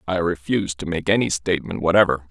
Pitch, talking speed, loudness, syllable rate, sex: 90 Hz, 180 wpm, -21 LUFS, 6.5 syllables/s, male